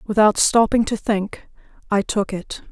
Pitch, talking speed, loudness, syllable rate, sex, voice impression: 210 Hz, 155 wpm, -19 LUFS, 4.2 syllables/s, female, feminine, slightly adult-like, sincere, friendly, sweet